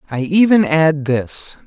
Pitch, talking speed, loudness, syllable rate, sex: 155 Hz, 145 wpm, -14 LUFS, 3.6 syllables/s, male